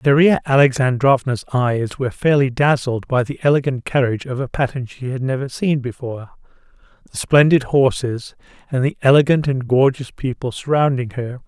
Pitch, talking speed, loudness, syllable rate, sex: 130 Hz, 150 wpm, -18 LUFS, 5.3 syllables/s, male